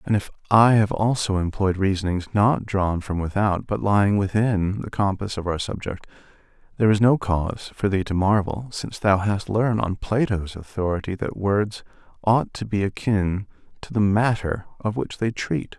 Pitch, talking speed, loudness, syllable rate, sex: 100 Hz, 180 wpm, -23 LUFS, 4.8 syllables/s, male